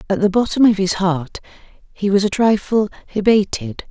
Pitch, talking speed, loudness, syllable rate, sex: 195 Hz, 170 wpm, -17 LUFS, 5.6 syllables/s, female